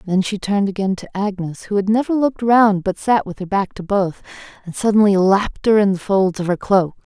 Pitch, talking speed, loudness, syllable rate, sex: 200 Hz, 235 wpm, -18 LUFS, 5.5 syllables/s, female